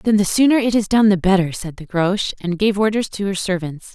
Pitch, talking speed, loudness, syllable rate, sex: 195 Hz, 260 wpm, -18 LUFS, 5.7 syllables/s, female